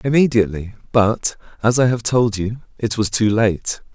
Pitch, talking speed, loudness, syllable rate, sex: 110 Hz, 165 wpm, -18 LUFS, 4.6 syllables/s, male